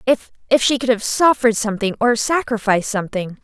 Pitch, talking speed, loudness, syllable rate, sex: 230 Hz, 155 wpm, -18 LUFS, 6.3 syllables/s, female